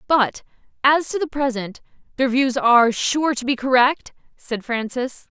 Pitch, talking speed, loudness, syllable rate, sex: 255 Hz, 155 wpm, -19 LUFS, 4.3 syllables/s, female